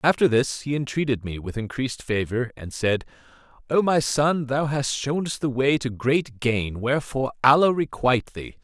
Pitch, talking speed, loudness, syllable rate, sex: 130 Hz, 180 wpm, -23 LUFS, 5.0 syllables/s, male